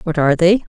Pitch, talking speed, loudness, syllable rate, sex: 175 Hz, 240 wpm, -15 LUFS, 7.1 syllables/s, female